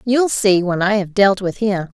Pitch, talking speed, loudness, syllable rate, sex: 200 Hz, 240 wpm, -16 LUFS, 4.5 syllables/s, female